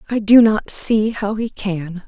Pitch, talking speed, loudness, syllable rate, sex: 210 Hz, 205 wpm, -17 LUFS, 3.7 syllables/s, female